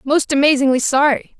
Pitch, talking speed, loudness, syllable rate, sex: 280 Hz, 130 wpm, -15 LUFS, 5.4 syllables/s, female